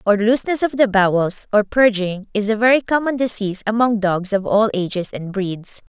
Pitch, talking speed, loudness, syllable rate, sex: 210 Hz, 190 wpm, -18 LUFS, 5.2 syllables/s, female